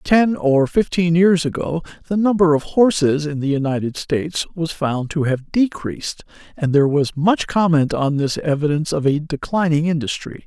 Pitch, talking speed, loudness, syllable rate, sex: 160 Hz, 170 wpm, -18 LUFS, 5.0 syllables/s, male